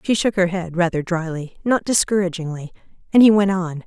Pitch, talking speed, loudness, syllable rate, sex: 180 Hz, 155 wpm, -19 LUFS, 5.5 syllables/s, female